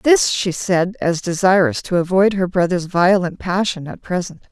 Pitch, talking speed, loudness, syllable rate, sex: 185 Hz, 175 wpm, -17 LUFS, 4.6 syllables/s, female